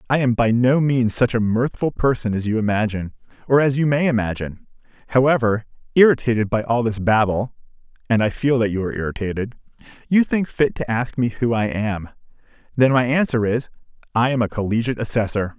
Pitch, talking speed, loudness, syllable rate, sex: 120 Hz, 180 wpm, -20 LUFS, 5.3 syllables/s, male